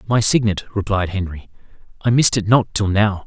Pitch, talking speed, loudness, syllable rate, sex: 105 Hz, 185 wpm, -18 LUFS, 5.5 syllables/s, male